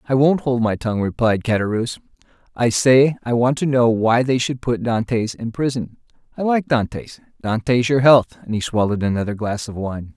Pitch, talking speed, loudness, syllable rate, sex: 120 Hz, 195 wpm, -19 LUFS, 5.3 syllables/s, male